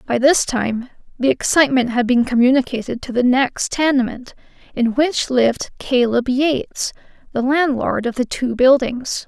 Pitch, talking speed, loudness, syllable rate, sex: 255 Hz, 150 wpm, -17 LUFS, 4.6 syllables/s, female